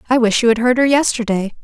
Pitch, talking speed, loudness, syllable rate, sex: 235 Hz, 255 wpm, -15 LUFS, 6.5 syllables/s, female